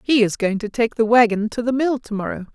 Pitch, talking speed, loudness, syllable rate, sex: 225 Hz, 260 wpm, -19 LUFS, 5.8 syllables/s, female